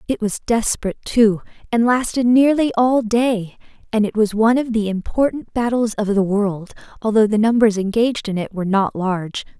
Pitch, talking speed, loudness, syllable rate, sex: 220 Hz, 175 wpm, -18 LUFS, 5.3 syllables/s, female